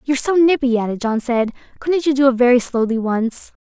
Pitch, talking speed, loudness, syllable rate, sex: 255 Hz, 230 wpm, -17 LUFS, 5.7 syllables/s, female